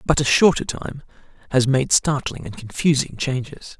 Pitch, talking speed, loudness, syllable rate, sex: 135 Hz, 160 wpm, -20 LUFS, 4.8 syllables/s, male